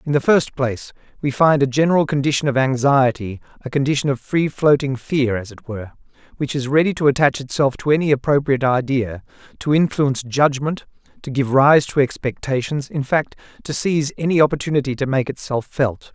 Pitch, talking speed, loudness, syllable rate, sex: 135 Hz, 180 wpm, -18 LUFS, 5.7 syllables/s, male